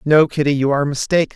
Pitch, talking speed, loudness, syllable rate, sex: 145 Hz, 220 wpm, -17 LUFS, 6.9 syllables/s, male